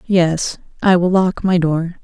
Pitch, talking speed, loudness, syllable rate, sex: 175 Hz, 175 wpm, -16 LUFS, 3.6 syllables/s, female